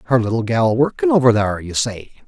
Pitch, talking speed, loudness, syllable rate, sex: 110 Hz, 210 wpm, -17 LUFS, 5.7 syllables/s, male